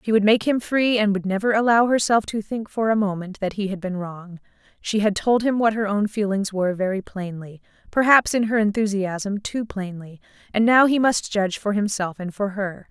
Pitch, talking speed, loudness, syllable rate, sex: 205 Hz, 210 wpm, -21 LUFS, 5.2 syllables/s, female